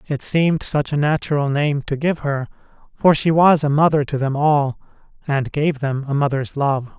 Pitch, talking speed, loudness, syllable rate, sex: 145 Hz, 200 wpm, -18 LUFS, 4.8 syllables/s, male